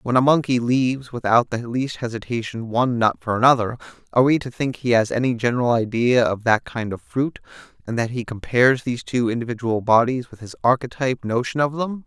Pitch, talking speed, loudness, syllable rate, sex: 120 Hz, 200 wpm, -21 LUFS, 5.9 syllables/s, male